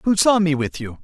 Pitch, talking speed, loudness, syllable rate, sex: 165 Hz, 290 wpm, -18 LUFS, 5.6 syllables/s, male